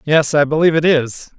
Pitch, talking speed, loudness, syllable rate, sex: 150 Hz, 215 wpm, -14 LUFS, 5.7 syllables/s, male